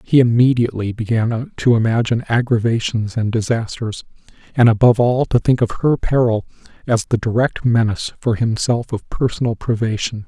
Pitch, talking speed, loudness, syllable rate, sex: 115 Hz, 145 wpm, -17 LUFS, 5.4 syllables/s, male